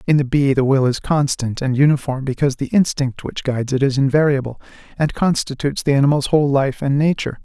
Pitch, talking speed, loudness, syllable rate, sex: 140 Hz, 200 wpm, -18 LUFS, 6.2 syllables/s, male